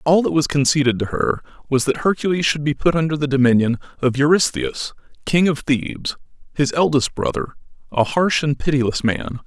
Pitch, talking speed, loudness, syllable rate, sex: 145 Hz, 180 wpm, -19 LUFS, 5.5 syllables/s, male